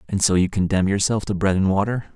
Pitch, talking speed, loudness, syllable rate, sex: 100 Hz, 250 wpm, -20 LUFS, 6.2 syllables/s, male